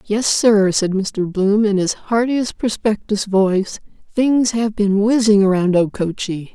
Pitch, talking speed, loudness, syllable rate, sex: 205 Hz, 145 wpm, -17 LUFS, 3.9 syllables/s, female